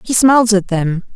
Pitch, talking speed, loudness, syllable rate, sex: 210 Hz, 210 wpm, -13 LUFS, 5.2 syllables/s, female